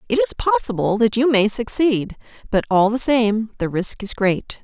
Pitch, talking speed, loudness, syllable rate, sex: 215 Hz, 195 wpm, -19 LUFS, 4.6 syllables/s, female